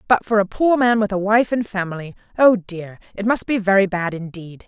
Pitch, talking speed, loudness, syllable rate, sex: 205 Hz, 220 wpm, -18 LUFS, 5.4 syllables/s, female